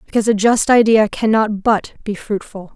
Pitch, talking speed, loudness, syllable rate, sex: 215 Hz, 175 wpm, -15 LUFS, 5.2 syllables/s, female